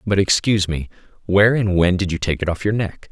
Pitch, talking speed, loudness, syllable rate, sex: 95 Hz, 250 wpm, -18 LUFS, 6.2 syllables/s, male